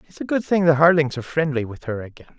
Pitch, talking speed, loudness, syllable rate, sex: 145 Hz, 275 wpm, -20 LUFS, 6.8 syllables/s, male